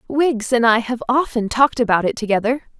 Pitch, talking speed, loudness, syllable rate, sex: 240 Hz, 195 wpm, -18 LUFS, 5.6 syllables/s, female